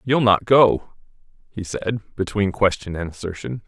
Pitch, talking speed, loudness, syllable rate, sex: 105 Hz, 145 wpm, -20 LUFS, 4.5 syllables/s, male